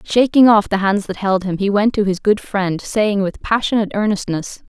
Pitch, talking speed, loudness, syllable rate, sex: 205 Hz, 215 wpm, -17 LUFS, 5.1 syllables/s, female